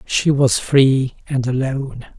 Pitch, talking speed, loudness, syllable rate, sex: 130 Hz, 135 wpm, -17 LUFS, 3.9 syllables/s, male